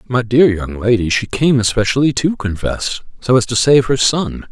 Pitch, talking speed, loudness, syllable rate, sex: 120 Hz, 200 wpm, -15 LUFS, 4.8 syllables/s, male